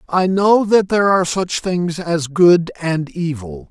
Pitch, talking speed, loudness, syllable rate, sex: 170 Hz, 180 wpm, -16 LUFS, 4.1 syllables/s, male